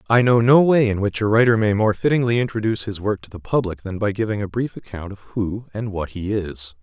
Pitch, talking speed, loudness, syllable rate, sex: 105 Hz, 255 wpm, -20 LUFS, 6.0 syllables/s, male